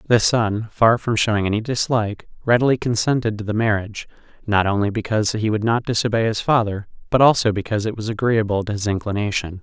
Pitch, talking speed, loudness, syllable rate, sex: 110 Hz, 185 wpm, -20 LUFS, 6.2 syllables/s, male